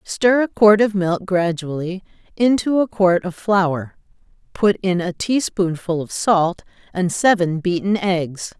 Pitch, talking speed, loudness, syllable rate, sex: 190 Hz, 145 wpm, -18 LUFS, 3.9 syllables/s, female